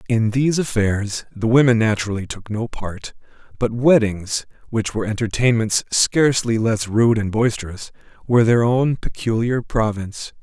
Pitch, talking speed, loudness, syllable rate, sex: 115 Hz, 140 wpm, -19 LUFS, 4.9 syllables/s, male